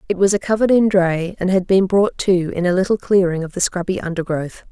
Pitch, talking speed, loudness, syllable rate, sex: 185 Hz, 240 wpm, -17 LUFS, 5.8 syllables/s, female